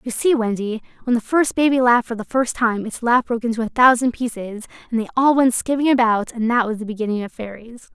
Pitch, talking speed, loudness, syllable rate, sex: 235 Hz, 240 wpm, -19 LUFS, 6.0 syllables/s, female